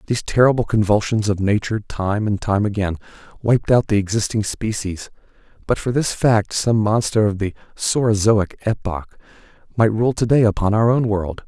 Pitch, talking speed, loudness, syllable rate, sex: 105 Hz, 155 wpm, -19 LUFS, 5.2 syllables/s, male